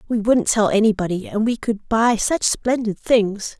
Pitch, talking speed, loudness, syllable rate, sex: 220 Hz, 185 wpm, -19 LUFS, 4.4 syllables/s, female